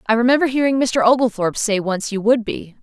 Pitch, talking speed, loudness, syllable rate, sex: 230 Hz, 210 wpm, -18 LUFS, 6.0 syllables/s, female